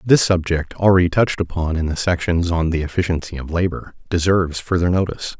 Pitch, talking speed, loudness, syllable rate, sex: 85 Hz, 180 wpm, -19 LUFS, 6.0 syllables/s, male